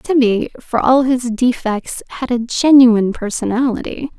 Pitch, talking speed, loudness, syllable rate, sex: 245 Hz, 130 wpm, -15 LUFS, 4.4 syllables/s, female